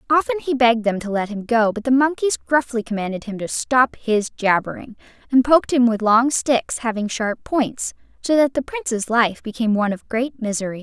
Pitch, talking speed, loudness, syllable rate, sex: 240 Hz, 205 wpm, -20 LUFS, 5.4 syllables/s, female